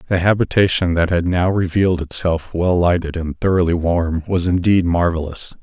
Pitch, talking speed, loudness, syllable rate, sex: 90 Hz, 160 wpm, -17 LUFS, 5.1 syllables/s, male